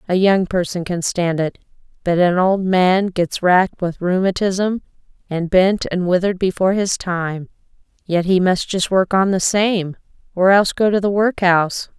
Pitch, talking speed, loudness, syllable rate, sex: 185 Hz, 175 wpm, -17 LUFS, 4.6 syllables/s, female